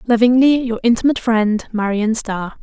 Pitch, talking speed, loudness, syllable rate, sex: 230 Hz, 115 wpm, -16 LUFS, 5.1 syllables/s, female